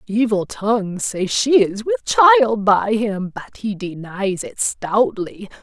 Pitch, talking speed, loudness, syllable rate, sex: 215 Hz, 150 wpm, -18 LUFS, 3.5 syllables/s, female